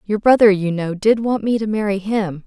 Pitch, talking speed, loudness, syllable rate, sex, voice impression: 205 Hz, 245 wpm, -17 LUFS, 5.1 syllables/s, female, feminine, adult-like, fluent, slightly intellectual, calm